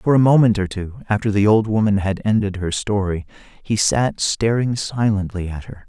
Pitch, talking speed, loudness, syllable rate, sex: 105 Hz, 195 wpm, -19 LUFS, 5.0 syllables/s, male